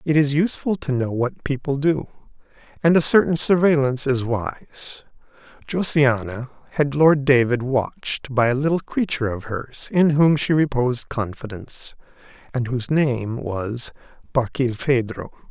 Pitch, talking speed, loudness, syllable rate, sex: 135 Hz, 135 wpm, -21 LUFS, 4.8 syllables/s, male